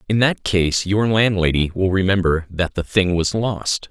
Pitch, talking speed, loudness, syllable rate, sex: 95 Hz, 185 wpm, -19 LUFS, 4.4 syllables/s, male